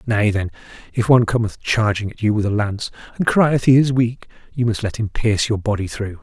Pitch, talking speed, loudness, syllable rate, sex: 110 Hz, 230 wpm, -19 LUFS, 5.8 syllables/s, male